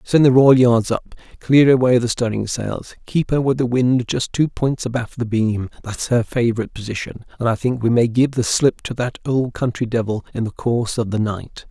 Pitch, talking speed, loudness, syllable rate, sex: 120 Hz, 215 wpm, -18 LUFS, 5.1 syllables/s, male